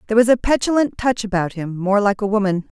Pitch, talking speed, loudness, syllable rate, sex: 210 Hz, 215 wpm, -18 LUFS, 6.3 syllables/s, female